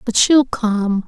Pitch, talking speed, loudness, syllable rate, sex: 230 Hz, 165 wpm, -15 LUFS, 3.1 syllables/s, female